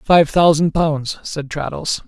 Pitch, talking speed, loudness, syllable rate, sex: 155 Hz, 145 wpm, -17 LUFS, 3.7 syllables/s, male